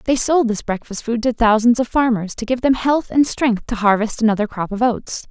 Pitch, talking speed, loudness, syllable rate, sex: 230 Hz, 235 wpm, -18 LUFS, 5.2 syllables/s, female